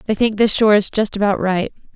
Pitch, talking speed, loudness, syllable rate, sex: 205 Hz, 245 wpm, -16 LUFS, 6.3 syllables/s, female